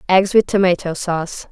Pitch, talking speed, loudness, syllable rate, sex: 185 Hz, 160 wpm, -17 LUFS, 5.3 syllables/s, female